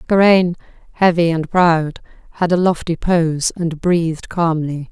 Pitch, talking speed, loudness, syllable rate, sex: 170 Hz, 135 wpm, -16 LUFS, 4.1 syllables/s, female